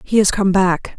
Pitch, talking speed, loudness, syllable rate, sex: 190 Hz, 245 wpm, -16 LUFS, 4.8 syllables/s, female